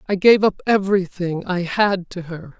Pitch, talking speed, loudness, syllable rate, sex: 185 Hz, 185 wpm, -18 LUFS, 4.7 syllables/s, female